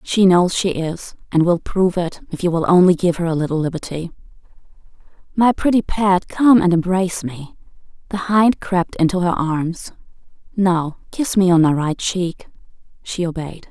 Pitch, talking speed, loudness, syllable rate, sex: 180 Hz, 170 wpm, -18 LUFS, 4.8 syllables/s, female